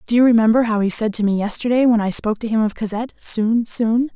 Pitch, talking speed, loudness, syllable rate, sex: 225 Hz, 260 wpm, -17 LUFS, 6.3 syllables/s, female